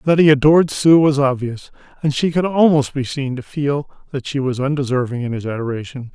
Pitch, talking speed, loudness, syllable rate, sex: 140 Hz, 195 wpm, -17 LUFS, 5.5 syllables/s, male